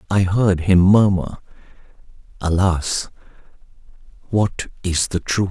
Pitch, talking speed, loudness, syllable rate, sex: 95 Hz, 100 wpm, -18 LUFS, 3.7 syllables/s, male